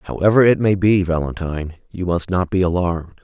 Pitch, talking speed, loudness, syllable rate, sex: 90 Hz, 185 wpm, -18 LUFS, 5.6 syllables/s, male